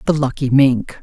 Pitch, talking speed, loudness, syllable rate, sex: 135 Hz, 175 wpm, -15 LUFS, 4.6 syllables/s, female